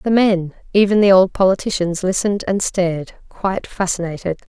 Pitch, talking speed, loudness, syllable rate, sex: 190 Hz, 130 wpm, -17 LUFS, 5.4 syllables/s, female